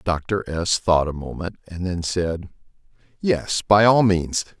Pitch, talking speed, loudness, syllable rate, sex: 90 Hz, 145 wpm, -21 LUFS, 3.7 syllables/s, male